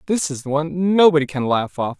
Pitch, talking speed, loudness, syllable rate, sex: 155 Hz, 210 wpm, -18 LUFS, 5.5 syllables/s, male